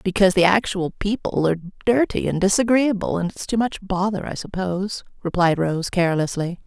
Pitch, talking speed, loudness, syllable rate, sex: 185 Hz, 160 wpm, -21 LUFS, 5.4 syllables/s, female